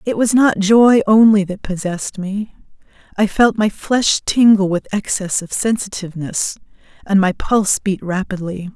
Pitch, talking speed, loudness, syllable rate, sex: 200 Hz, 150 wpm, -16 LUFS, 4.6 syllables/s, female